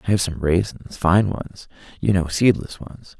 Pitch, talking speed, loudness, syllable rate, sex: 95 Hz, 190 wpm, -20 LUFS, 4.4 syllables/s, male